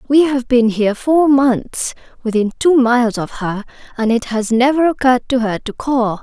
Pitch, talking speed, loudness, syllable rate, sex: 245 Hz, 195 wpm, -15 LUFS, 4.8 syllables/s, female